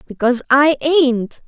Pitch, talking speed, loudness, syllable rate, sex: 270 Hz, 120 wpm, -15 LUFS, 4.2 syllables/s, female